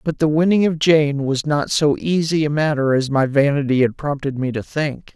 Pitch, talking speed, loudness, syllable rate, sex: 145 Hz, 220 wpm, -18 LUFS, 5.0 syllables/s, male